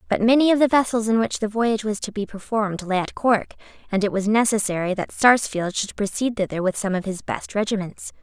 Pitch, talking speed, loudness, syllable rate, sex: 215 Hz, 225 wpm, -22 LUFS, 5.9 syllables/s, female